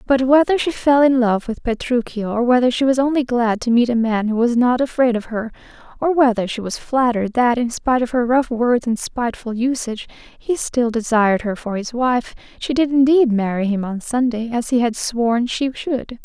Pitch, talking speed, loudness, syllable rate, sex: 240 Hz, 215 wpm, -18 LUFS, 5.2 syllables/s, female